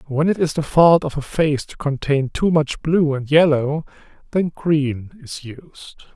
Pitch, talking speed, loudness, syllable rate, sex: 150 Hz, 185 wpm, -18 LUFS, 4.2 syllables/s, male